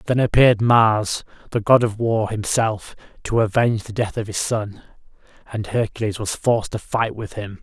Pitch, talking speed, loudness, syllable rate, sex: 110 Hz, 180 wpm, -20 LUFS, 5.0 syllables/s, male